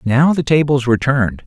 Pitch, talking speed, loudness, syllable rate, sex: 135 Hz, 205 wpm, -15 LUFS, 5.8 syllables/s, male